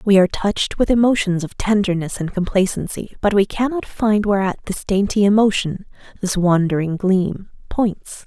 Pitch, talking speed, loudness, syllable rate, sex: 195 Hz, 155 wpm, -18 LUFS, 5.0 syllables/s, female